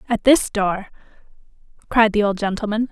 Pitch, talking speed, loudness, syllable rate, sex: 210 Hz, 145 wpm, -19 LUFS, 5.2 syllables/s, female